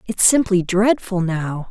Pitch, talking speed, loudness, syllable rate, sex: 195 Hz, 140 wpm, -17 LUFS, 3.8 syllables/s, female